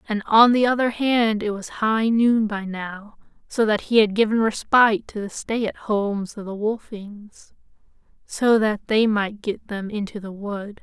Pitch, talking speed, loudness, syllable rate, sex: 215 Hz, 190 wpm, -21 LUFS, 4.3 syllables/s, female